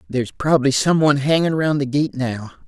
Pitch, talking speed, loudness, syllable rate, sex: 140 Hz, 200 wpm, -18 LUFS, 6.4 syllables/s, male